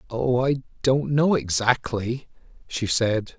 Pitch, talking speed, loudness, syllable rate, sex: 125 Hz, 125 wpm, -23 LUFS, 3.6 syllables/s, male